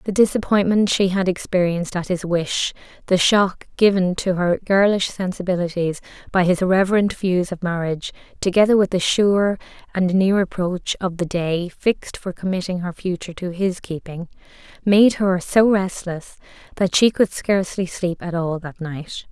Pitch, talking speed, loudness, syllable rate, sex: 185 Hz, 160 wpm, -20 LUFS, 4.9 syllables/s, female